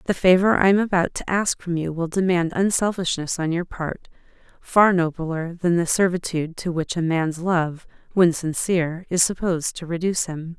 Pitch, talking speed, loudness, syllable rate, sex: 175 Hz, 180 wpm, -21 LUFS, 5.0 syllables/s, female